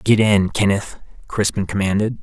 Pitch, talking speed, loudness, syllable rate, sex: 100 Hz, 135 wpm, -18 LUFS, 4.7 syllables/s, male